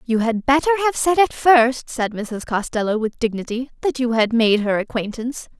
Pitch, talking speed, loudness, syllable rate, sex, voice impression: 245 Hz, 195 wpm, -19 LUFS, 5.1 syllables/s, female, feminine, slightly young, clear, slightly fluent, slightly cute, friendly, slightly kind